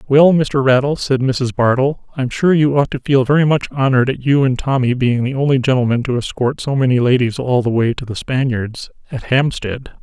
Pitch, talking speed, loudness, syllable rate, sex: 130 Hz, 215 wpm, -16 LUFS, 5.4 syllables/s, male